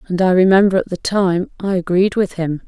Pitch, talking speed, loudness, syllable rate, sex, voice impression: 185 Hz, 225 wpm, -16 LUFS, 5.4 syllables/s, female, feminine, gender-neutral, adult-like, middle-aged, slightly thin, relaxed, slightly weak, dark, slightly soft, muffled, slightly halting, slightly raspy, slightly cool, intellectual, very sincere, very calm, slightly friendly, slightly reassuring, very unique, elegant, slightly wild, slightly sweet, kind, slightly modest, slightly light